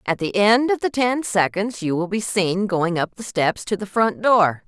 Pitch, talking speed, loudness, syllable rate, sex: 200 Hz, 245 wpm, -20 LUFS, 4.4 syllables/s, female